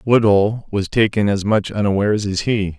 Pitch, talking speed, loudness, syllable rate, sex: 105 Hz, 170 wpm, -17 LUFS, 5.0 syllables/s, male